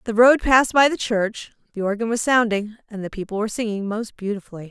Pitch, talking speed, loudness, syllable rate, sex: 220 Hz, 215 wpm, -20 LUFS, 6.1 syllables/s, female